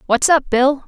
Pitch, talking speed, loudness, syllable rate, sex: 270 Hz, 205 wpm, -15 LUFS, 4.6 syllables/s, female